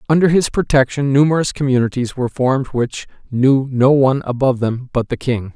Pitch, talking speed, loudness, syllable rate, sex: 130 Hz, 175 wpm, -16 LUFS, 5.8 syllables/s, male